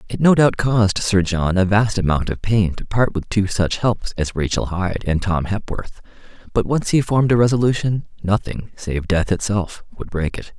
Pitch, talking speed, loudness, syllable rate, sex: 100 Hz, 205 wpm, -19 LUFS, 5.0 syllables/s, male